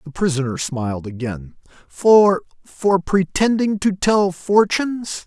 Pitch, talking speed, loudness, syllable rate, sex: 170 Hz, 105 wpm, -18 LUFS, 3.9 syllables/s, male